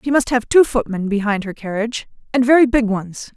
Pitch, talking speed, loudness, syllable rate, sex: 230 Hz, 215 wpm, -17 LUFS, 5.7 syllables/s, female